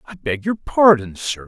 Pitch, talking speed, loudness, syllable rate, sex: 140 Hz, 205 wpm, -18 LUFS, 4.2 syllables/s, male